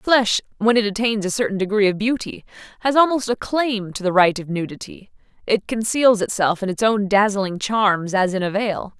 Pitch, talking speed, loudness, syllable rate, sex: 210 Hz, 200 wpm, -19 LUFS, 5.0 syllables/s, female